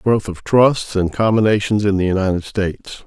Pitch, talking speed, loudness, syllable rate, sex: 100 Hz, 175 wpm, -17 LUFS, 5.1 syllables/s, male